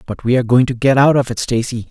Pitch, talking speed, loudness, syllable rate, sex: 125 Hz, 285 wpm, -15 LUFS, 6.3 syllables/s, male